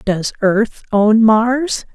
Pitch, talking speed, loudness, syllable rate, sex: 220 Hz, 125 wpm, -14 LUFS, 2.5 syllables/s, female